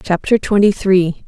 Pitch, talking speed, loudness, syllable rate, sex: 190 Hz, 140 wpm, -14 LUFS, 4.3 syllables/s, female